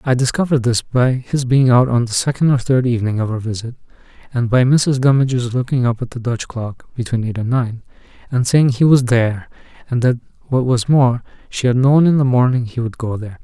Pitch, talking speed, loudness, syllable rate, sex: 125 Hz, 225 wpm, -16 LUFS, 5.7 syllables/s, male